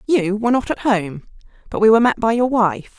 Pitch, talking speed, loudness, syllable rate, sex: 215 Hz, 240 wpm, -17 LUFS, 5.9 syllables/s, female